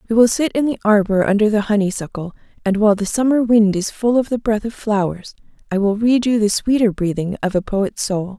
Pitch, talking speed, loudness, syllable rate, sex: 210 Hz, 230 wpm, -17 LUFS, 5.7 syllables/s, female